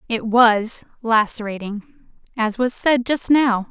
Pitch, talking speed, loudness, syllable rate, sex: 230 Hz, 130 wpm, -19 LUFS, 3.6 syllables/s, female